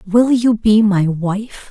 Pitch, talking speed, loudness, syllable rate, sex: 210 Hz, 175 wpm, -15 LUFS, 3.2 syllables/s, female